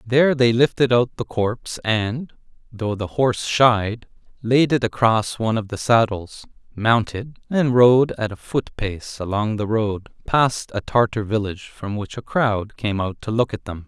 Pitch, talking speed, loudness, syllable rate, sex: 115 Hz, 180 wpm, -20 LUFS, 4.2 syllables/s, male